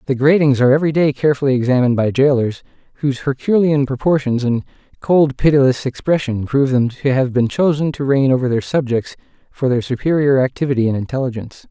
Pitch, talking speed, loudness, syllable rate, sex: 135 Hz, 170 wpm, -16 LUFS, 6.3 syllables/s, male